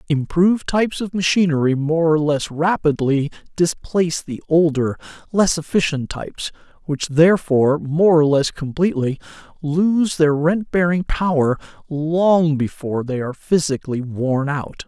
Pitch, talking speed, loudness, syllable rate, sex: 155 Hz, 130 wpm, -19 LUFS, 4.6 syllables/s, male